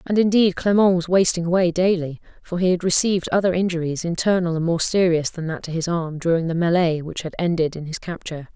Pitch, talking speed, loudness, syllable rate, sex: 175 Hz, 215 wpm, -20 LUFS, 6.0 syllables/s, female